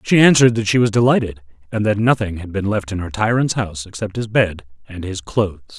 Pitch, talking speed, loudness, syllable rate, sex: 105 Hz, 230 wpm, -18 LUFS, 6.2 syllables/s, male